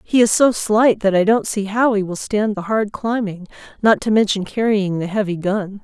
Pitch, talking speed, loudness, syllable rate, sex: 205 Hz, 225 wpm, -18 LUFS, 4.9 syllables/s, female